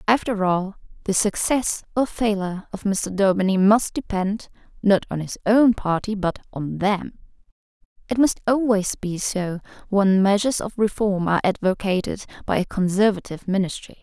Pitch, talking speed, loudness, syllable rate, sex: 200 Hz, 145 wpm, -22 LUFS, 5.0 syllables/s, female